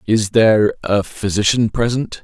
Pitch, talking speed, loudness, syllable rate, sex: 110 Hz, 135 wpm, -16 LUFS, 4.5 syllables/s, male